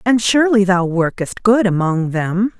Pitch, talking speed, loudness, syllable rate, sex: 200 Hz, 160 wpm, -16 LUFS, 4.5 syllables/s, female